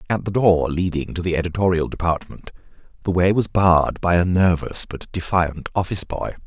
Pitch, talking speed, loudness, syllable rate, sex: 90 Hz, 175 wpm, -20 LUFS, 5.4 syllables/s, male